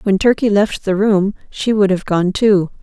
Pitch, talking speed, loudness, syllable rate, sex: 200 Hz, 210 wpm, -15 LUFS, 4.4 syllables/s, female